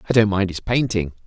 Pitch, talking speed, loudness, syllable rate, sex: 105 Hz, 240 wpm, -20 LUFS, 6.4 syllables/s, male